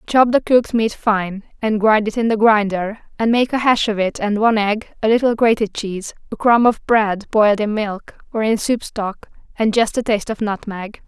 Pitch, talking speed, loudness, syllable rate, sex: 215 Hz, 220 wpm, -17 LUFS, 5.1 syllables/s, female